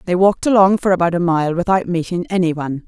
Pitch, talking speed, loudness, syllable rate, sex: 180 Hz, 210 wpm, -16 LUFS, 6.3 syllables/s, female